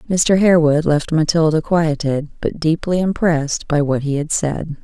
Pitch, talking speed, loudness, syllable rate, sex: 160 Hz, 160 wpm, -17 LUFS, 4.7 syllables/s, female